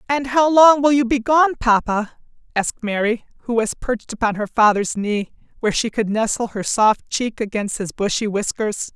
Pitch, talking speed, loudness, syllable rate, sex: 230 Hz, 190 wpm, -19 LUFS, 5.0 syllables/s, female